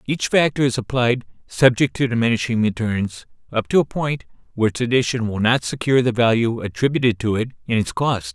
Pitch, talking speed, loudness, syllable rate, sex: 120 Hz, 185 wpm, -20 LUFS, 5.7 syllables/s, male